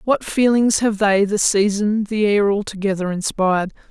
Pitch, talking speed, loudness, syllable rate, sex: 205 Hz, 155 wpm, -18 LUFS, 4.7 syllables/s, female